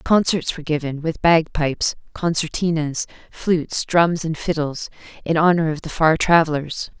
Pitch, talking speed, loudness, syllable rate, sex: 160 Hz, 135 wpm, -20 LUFS, 4.8 syllables/s, female